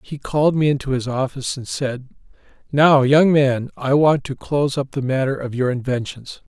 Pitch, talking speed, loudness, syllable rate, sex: 135 Hz, 190 wpm, -19 LUFS, 5.1 syllables/s, male